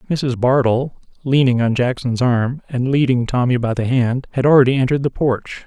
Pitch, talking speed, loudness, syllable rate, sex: 125 Hz, 180 wpm, -17 LUFS, 5.1 syllables/s, male